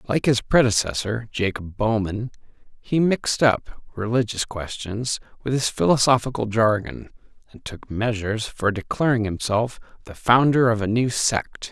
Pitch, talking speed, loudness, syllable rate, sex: 115 Hz, 135 wpm, -22 LUFS, 4.6 syllables/s, male